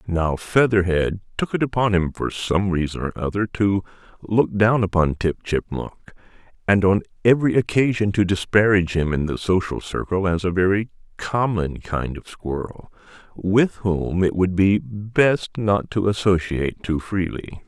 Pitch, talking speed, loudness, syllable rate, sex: 95 Hz, 155 wpm, -21 LUFS, 4.5 syllables/s, male